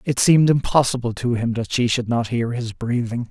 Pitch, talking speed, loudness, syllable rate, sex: 120 Hz, 220 wpm, -20 LUFS, 5.3 syllables/s, male